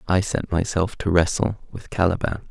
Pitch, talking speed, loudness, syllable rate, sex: 90 Hz, 170 wpm, -23 LUFS, 4.8 syllables/s, male